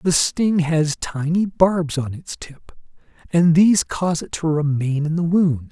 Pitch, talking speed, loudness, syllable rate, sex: 160 Hz, 180 wpm, -19 LUFS, 4.2 syllables/s, male